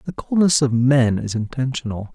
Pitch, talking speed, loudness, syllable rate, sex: 130 Hz, 170 wpm, -19 LUFS, 5.0 syllables/s, male